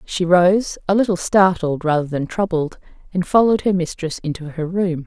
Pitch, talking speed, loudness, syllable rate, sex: 175 Hz, 180 wpm, -18 LUFS, 5.1 syllables/s, female